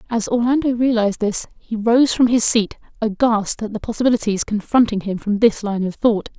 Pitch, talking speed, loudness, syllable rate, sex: 220 Hz, 190 wpm, -18 LUFS, 5.3 syllables/s, female